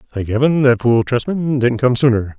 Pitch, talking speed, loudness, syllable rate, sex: 125 Hz, 200 wpm, -15 LUFS, 5.0 syllables/s, male